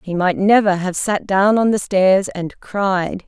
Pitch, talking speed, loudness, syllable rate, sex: 195 Hz, 200 wpm, -16 LUFS, 3.9 syllables/s, female